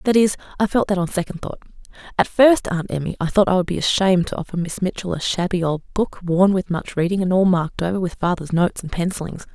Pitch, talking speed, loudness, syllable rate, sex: 185 Hz, 245 wpm, -20 LUFS, 6.3 syllables/s, female